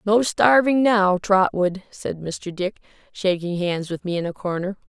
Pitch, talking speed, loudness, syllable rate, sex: 190 Hz, 170 wpm, -21 LUFS, 4.2 syllables/s, female